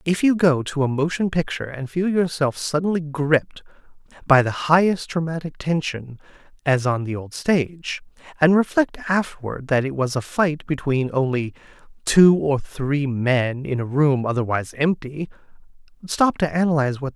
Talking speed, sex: 170 wpm, male